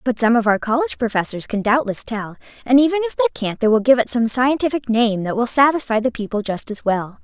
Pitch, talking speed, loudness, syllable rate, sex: 240 Hz, 240 wpm, -18 LUFS, 6.2 syllables/s, female